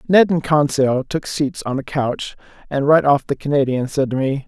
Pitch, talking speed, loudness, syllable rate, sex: 140 Hz, 215 wpm, -18 LUFS, 4.8 syllables/s, male